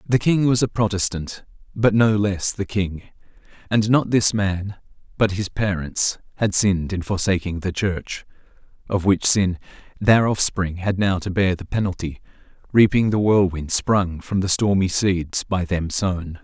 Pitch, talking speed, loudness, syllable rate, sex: 95 Hz, 160 wpm, -20 LUFS, 4.3 syllables/s, male